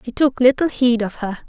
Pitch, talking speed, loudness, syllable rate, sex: 245 Hz, 245 wpm, -18 LUFS, 5.4 syllables/s, female